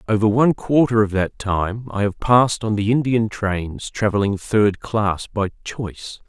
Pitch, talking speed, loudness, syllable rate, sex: 105 Hz, 170 wpm, -20 LUFS, 4.4 syllables/s, male